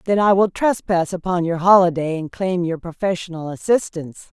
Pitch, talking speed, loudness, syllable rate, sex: 180 Hz, 165 wpm, -19 LUFS, 5.3 syllables/s, female